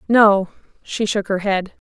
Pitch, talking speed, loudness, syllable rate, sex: 200 Hz, 160 wpm, -18 LUFS, 3.7 syllables/s, female